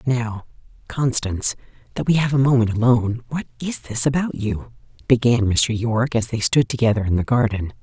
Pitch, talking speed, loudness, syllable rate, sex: 120 Hz, 175 wpm, -20 LUFS, 5.5 syllables/s, female